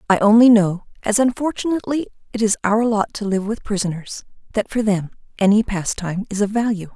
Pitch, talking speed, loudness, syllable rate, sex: 210 Hz, 165 wpm, -19 LUFS, 5.9 syllables/s, female